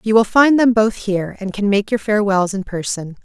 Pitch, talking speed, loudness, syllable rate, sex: 210 Hz, 240 wpm, -16 LUFS, 5.5 syllables/s, female